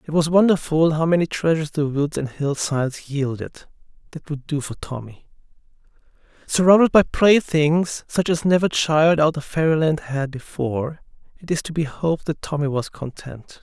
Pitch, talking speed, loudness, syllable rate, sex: 155 Hz, 165 wpm, -20 LUFS, 5.0 syllables/s, male